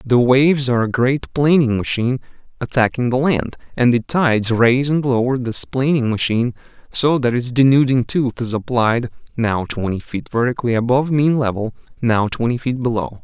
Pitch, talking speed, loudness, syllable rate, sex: 125 Hz, 170 wpm, -17 LUFS, 5.3 syllables/s, male